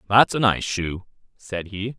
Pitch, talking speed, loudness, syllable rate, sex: 105 Hz, 180 wpm, -22 LUFS, 4.0 syllables/s, male